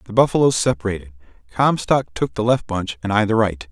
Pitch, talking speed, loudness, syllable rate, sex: 105 Hz, 195 wpm, -19 LUFS, 5.7 syllables/s, male